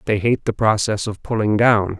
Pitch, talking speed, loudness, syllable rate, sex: 105 Hz, 210 wpm, -18 LUFS, 4.9 syllables/s, male